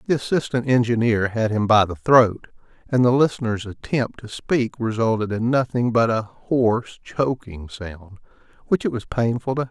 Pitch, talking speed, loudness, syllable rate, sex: 120 Hz, 175 wpm, -21 LUFS, 4.9 syllables/s, male